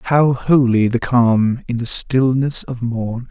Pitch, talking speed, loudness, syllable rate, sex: 125 Hz, 165 wpm, -16 LUFS, 3.4 syllables/s, male